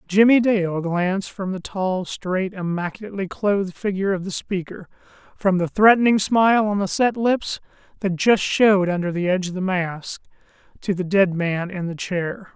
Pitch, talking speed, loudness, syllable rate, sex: 190 Hz, 175 wpm, -21 LUFS, 5.0 syllables/s, male